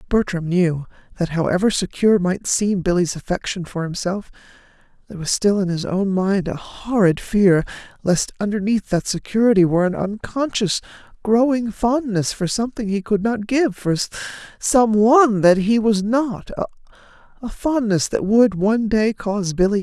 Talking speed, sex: 155 wpm, female